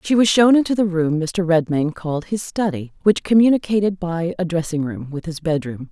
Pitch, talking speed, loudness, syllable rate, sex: 175 Hz, 205 wpm, -19 LUFS, 5.3 syllables/s, female